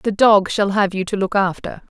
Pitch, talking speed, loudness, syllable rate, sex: 200 Hz, 240 wpm, -17 LUFS, 5.0 syllables/s, female